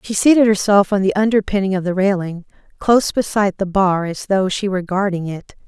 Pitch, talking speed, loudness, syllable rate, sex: 195 Hz, 200 wpm, -17 LUFS, 5.8 syllables/s, female